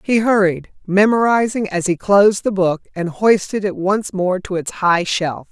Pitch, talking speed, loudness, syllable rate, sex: 195 Hz, 185 wpm, -17 LUFS, 4.4 syllables/s, female